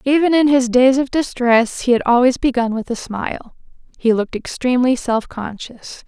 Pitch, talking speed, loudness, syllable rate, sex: 250 Hz, 170 wpm, -17 LUFS, 5.1 syllables/s, female